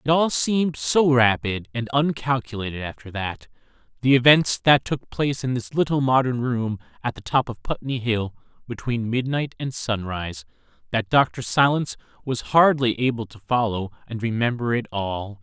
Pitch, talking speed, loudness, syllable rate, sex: 120 Hz, 150 wpm, -22 LUFS, 4.9 syllables/s, male